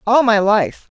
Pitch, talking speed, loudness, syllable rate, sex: 220 Hz, 185 wpm, -15 LUFS, 3.9 syllables/s, female